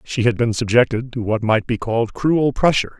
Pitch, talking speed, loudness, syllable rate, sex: 120 Hz, 220 wpm, -18 LUFS, 5.5 syllables/s, male